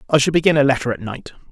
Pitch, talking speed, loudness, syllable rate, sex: 135 Hz, 275 wpm, -17 LUFS, 7.5 syllables/s, male